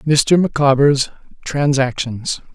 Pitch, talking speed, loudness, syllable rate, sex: 140 Hz, 70 wpm, -16 LUFS, 3.3 syllables/s, male